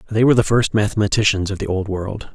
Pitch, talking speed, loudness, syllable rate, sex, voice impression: 105 Hz, 230 wpm, -18 LUFS, 6.5 syllables/s, male, very masculine, very adult-like, old, very thick, slightly tensed, powerful, slightly bright, slightly hard, muffled, very fluent, very cool, very intellectual, sincere, very calm, very mature, friendly, very reassuring, unique, elegant, wild, slightly sweet, slightly lively, very kind, modest